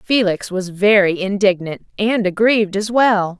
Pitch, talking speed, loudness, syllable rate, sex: 200 Hz, 125 wpm, -16 LUFS, 4.4 syllables/s, female